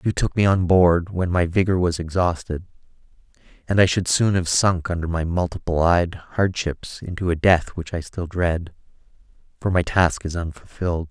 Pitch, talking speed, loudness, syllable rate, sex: 85 Hz, 175 wpm, -21 LUFS, 4.7 syllables/s, male